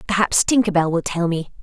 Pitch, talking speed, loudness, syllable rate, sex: 185 Hz, 220 wpm, -19 LUFS, 5.8 syllables/s, female